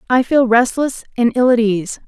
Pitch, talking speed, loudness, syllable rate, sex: 240 Hz, 205 wpm, -15 LUFS, 4.8 syllables/s, female